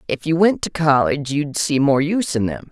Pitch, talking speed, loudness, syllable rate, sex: 150 Hz, 245 wpm, -18 LUFS, 5.5 syllables/s, female